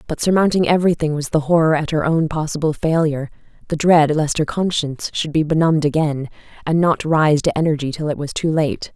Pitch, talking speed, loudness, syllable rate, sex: 155 Hz, 200 wpm, -18 LUFS, 5.9 syllables/s, female